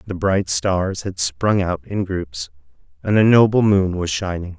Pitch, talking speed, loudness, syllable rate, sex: 90 Hz, 185 wpm, -19 LUFS, 4.2 syllables/s, male